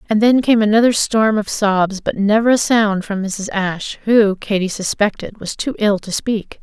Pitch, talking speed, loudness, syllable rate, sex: 210 Hz, 200 wpm, -16 LUFS, 4.6 syllables/s, female